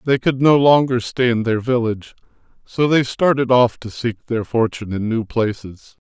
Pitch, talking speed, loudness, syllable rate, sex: 120 Hz, 185 wpm, -18 LUFS, 4.9 syllables/s, male